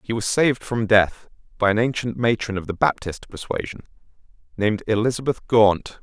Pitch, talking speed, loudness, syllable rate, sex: 110 Hz, 160 wpm, -21 LUFS, 5.4 syllables/s, male